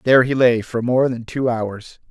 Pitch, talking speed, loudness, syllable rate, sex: 120 Hz, 230 wpm, -18 LUFS, 4.7 syllables/s, male